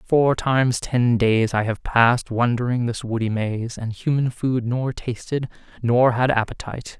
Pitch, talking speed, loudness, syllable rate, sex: 120 Hz, 165 wpm, -21 LUFS, 4.4 syllables/s, male